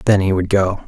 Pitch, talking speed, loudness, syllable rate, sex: 95 Hz, 275 wpm, -16 LUFS, 5.6 syllables/s, male